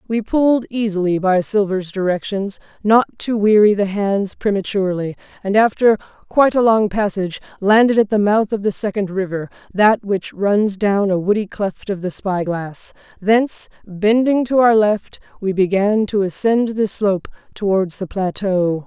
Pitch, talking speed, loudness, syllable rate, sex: 200 Hz, 160 wpm, -17 LUFS, 4.7 syllables/s, female